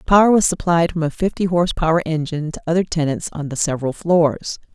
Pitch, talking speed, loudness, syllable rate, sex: 165 Hz, 200 wpm, -18 LUFS, 6.2 syllables/s, female